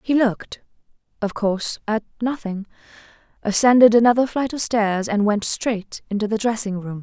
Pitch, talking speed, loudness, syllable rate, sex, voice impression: 220 Hz, 155 wpm, -20 LUFS, 5.1 syllables/s, female, feminine, adult-like, relaxed, powerful, clear, fluent, intellectual, calm, elegant, lively, sharp